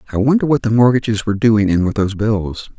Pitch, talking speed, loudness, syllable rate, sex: 110 Hz, 235 wpm, -15 LUFS, 6.5 syllables/s, male